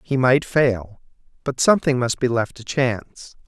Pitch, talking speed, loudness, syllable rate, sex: 125 Hz, 175 wpm, -20 LUFS, 4.5 syllables/s, male